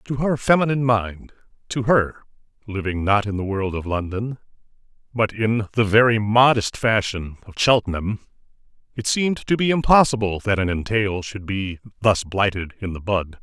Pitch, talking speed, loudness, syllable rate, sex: 110 Hz, 150 wpm, -21 LUFS, 5.2 syllables/s, male